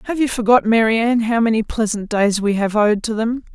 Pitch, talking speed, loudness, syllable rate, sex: 225 Hz, 220 wpm, -17 LUFS, 5.4 syllables/s, female